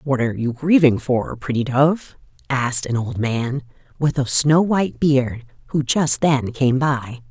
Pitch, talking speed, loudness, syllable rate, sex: 135 Hz, 175 wpm, -19 LUFS, 4.2 syllables/s, female